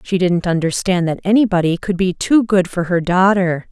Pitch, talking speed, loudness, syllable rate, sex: 185 Hz, 195 wpm, -16 LUFS, 5.1 syllables/s, female